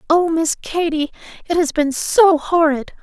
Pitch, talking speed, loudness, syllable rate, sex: 320 Hz, 160 wpm, -17 LUFS, 4.3 syllables/s, female